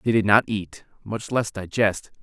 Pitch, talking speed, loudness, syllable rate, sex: 105 Hz, 190 wpm, -23 LUFS, 4.4 syllables/s, male